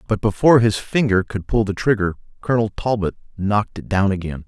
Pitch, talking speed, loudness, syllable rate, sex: 105 Hz, 190 wpm, -19 LUFS, 6.0 syllables/s, male